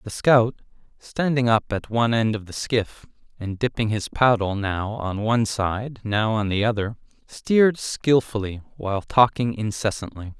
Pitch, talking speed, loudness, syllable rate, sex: 110 Hz, 155 wpm, -22 LUFS, 4.6 syllables/s, male